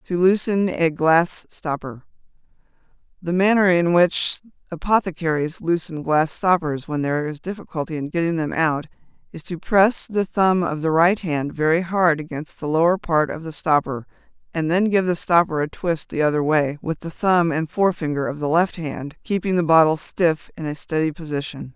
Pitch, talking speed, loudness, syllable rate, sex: 165 Hz, 180 wpm, -21 LUFS, 5.0 syllables/s, female